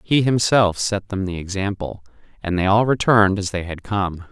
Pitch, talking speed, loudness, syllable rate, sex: 100 Hz, 195 wpm, -19 LUFS, 5.0 syllables/s, male